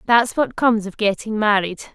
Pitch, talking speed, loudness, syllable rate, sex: 220 Hz, 185 wpm, -19 LUFS, 5.4 syllables/s, female